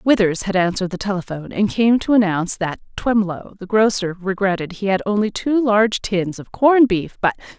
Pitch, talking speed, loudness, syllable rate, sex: 200 Hz, 190 wpm, -19 LUFS, 5.6 syllables/s, female